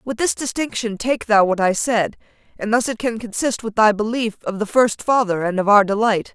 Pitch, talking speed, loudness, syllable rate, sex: 220 Hz, 225 wpm, -19 LUFS, 5.2 syllables/s, female